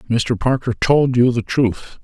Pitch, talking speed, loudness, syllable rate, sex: 120 Hz, 175 wpm, -17 LUFS, 3.9 syllables/s, male